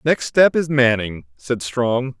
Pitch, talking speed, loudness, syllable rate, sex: 130 Hz, 165 wpm, -18 LUFS, 3.5 syllables/s, male